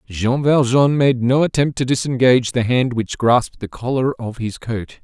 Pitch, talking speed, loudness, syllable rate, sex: 125 Hz, 190 wpm, -17 LUFS, 4.7 syllables/s, male